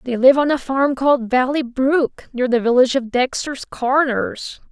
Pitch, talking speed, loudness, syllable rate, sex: 260 Hz, 180 wpm, -18 LUFS, 4.5 syllables/s, female